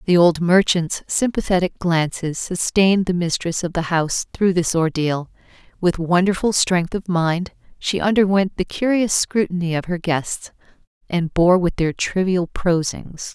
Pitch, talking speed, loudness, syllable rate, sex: 175 Hz, 150 wpm, -19 LUFS, 4.4 syllables/s, female